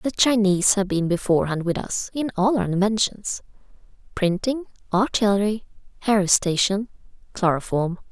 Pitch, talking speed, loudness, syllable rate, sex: 200 Hz, 105 wpm, -22 LUFS, 5.1 syllables/s, female